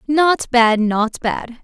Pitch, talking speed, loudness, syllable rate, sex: 250 Hz, 145 wpm, -16 LUFS, 3.0 syllables/s, female